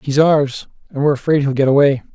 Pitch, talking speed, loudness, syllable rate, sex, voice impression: 140 Hz, 250 wpm, -15 LUFS, 6.8 syllables/s, male, masculine, adult-like, relaxed, muffled, raspy, intellectual, calm, friendly, unique, lively, kind, modest